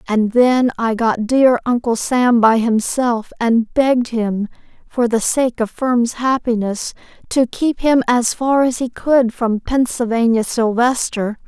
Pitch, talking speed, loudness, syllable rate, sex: 240 Hz, 150 wpm, -16 LUFS, 3.8 syllables/s, female